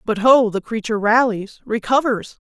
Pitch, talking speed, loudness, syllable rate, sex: 225 Hz, 120 wpm, -18 LUFS, 4.9 syllables/s, female